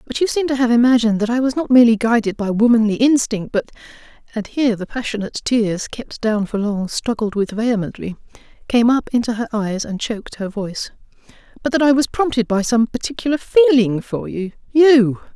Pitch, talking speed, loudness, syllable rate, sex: 230 Hz, 175 wpm, -17 LUFS, 5.1 syllables/s, female